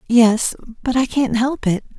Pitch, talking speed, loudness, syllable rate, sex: 240 Hz, 180 wpm, -18 LUFS, 4.2 syllables/s, female